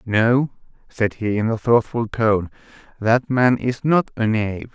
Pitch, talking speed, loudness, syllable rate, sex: 115 Hz, 165 wpm, -20 LUFS, 4.0 syllables/s, male